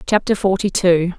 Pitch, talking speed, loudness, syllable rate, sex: 185 Hz, 150 wpm, -17 LUFS, 4.8 syllables/s, female